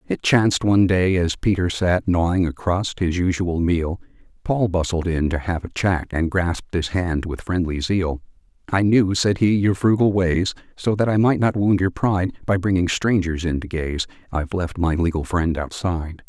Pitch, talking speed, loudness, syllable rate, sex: 90 Hz, 195 wpm, -21 LUFS, 4.8 syllables/s, male